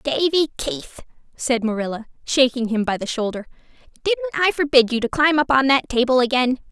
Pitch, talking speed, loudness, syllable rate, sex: 265 Hz, 180 wpm, -19 LUFS, 5.3 syllables/s, female